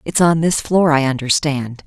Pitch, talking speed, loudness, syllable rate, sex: 150 Hz, 195 wpm, -16 LUFS, 4.6 syllables/s, female